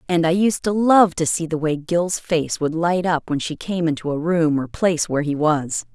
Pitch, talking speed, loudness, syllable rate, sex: 165 Hz, 250 wpm, -20 LUFS, 4.9 syllables/s, female